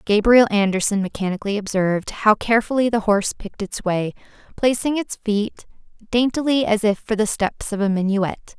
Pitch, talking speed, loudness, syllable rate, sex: 215 Hz, 160 wpm, -20 LUFS, 5.4 syllables/s, female